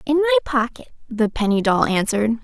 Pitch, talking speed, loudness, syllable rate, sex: 230 Hz, 170 wpm, -19 LUFS, 5.9 syllables/s, female